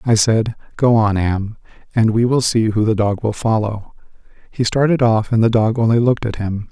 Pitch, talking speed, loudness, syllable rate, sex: 110 Hz, 215 wpm, -16 LUFS, 5.1 syllables/s, male